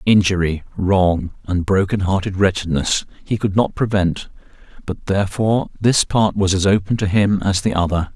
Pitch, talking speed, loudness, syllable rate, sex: 95 Hz, 160 wpm, -18 LUFS, 4.8 syllables/s, male